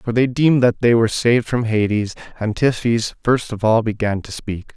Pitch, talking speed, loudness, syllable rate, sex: 115 Hz, 215 wpm, -18 LUFS, 5.2 syllables/s, male